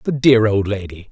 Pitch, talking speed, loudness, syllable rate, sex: 110 Hz, 215 wpm, -16 LUFS, 5.1 syllables/s, male